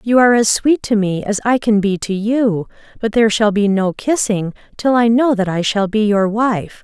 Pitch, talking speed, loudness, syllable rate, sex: 215 Hz, 235 wpm, -15 LUFS, 4.9 syllables/s, female